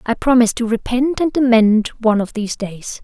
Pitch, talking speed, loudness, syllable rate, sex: 235 Hz, 200 wpm, -16 LUFS, 5.8 syllables/s, female